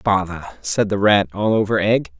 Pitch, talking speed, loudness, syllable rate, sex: 100 Hz, 190 wpm, -18 LUFS, 4.8 syllables/s, male